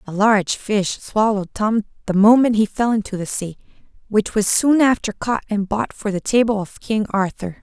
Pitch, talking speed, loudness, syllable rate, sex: 210 Hz, 195 wpm, -19 LUFS, 5.0 syllables/s, female